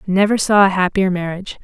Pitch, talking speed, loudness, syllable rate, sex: 190 Hz, 185 wpm, -16 LUFS, 6.1 syllables/s, female